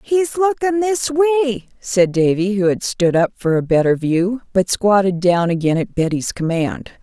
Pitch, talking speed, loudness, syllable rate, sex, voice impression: 210 Hz, 180 wpm, -17 LUFS, 4.5 syllables/s, female, feminine, slightly gender-neutral, very adult-like, slightly old, thin, tensed, slightly powerful, bright, hard, very clear, very fluent, raspy, cool, very intellectual, slightly refreshing, very sincere, very calm, mature, friendly, very reassuring, very unique, slightly elegant, very wild, sweet, kind, modest